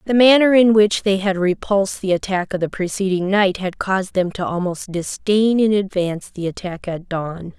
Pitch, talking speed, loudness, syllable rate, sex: 195 Hz, 200 wpm, -18 LUFS, 5.0 syllables/s, female